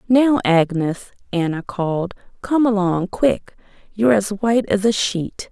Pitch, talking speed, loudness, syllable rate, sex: 200 Hz, 140 wpm, -19 LUFS, 4.4 syllables/s, female